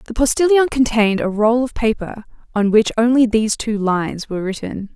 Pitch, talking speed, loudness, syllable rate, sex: 225 Hz, 180 wpm, -17 LUFS, 5.4 syllables/s, female